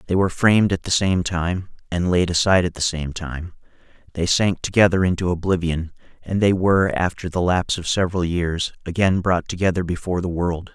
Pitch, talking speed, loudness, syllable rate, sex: 90 Hz, 190 wpm, -20 LUFS, 5.7 syllables/s, male